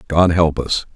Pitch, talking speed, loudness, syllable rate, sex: 80 Hz, 190 wpm, -16 LUFS, 4.1 syllables/s, male